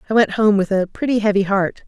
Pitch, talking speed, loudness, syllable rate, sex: 205 Hz, 255 wpm, -17 LUFS, 6.1 syllables/s, female